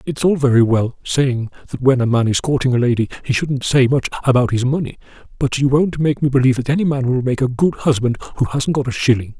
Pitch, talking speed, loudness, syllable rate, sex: 130 Hz, 250 wpm, -17 LUFS, 6.1 syllables/s, male